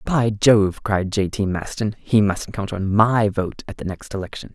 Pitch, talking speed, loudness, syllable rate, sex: 105 Hz, 210 wpm, -20 LUFS, 4.4 syllables/s, male